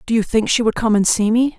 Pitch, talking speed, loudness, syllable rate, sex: 225 Hz, 340 wpm, -16 LUFS, 6.1 syllables/s, female